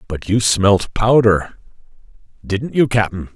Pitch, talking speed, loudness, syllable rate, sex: 105 Hz, 105 wpm, -16 LUFS, 3.4 syllables/s, male